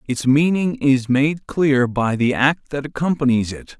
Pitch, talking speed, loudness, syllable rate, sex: 140 Hz, 175 wpm, -18 LUFS, 4.1 syllables/s, male